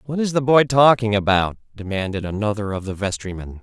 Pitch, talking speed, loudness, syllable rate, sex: 110 Hz, 180 wpm, -19 LUFS, 5.7 syllables/s, male